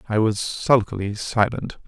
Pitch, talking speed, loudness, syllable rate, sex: 110 Hz, 130 wpm, -22 LUFS, 4.3 syllables/s, male